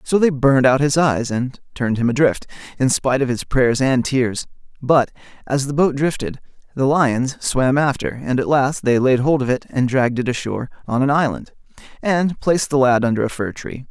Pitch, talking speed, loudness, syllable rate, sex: 130 Hz, 210 wpm, -18 LUFS, 5.3 syllables/s, male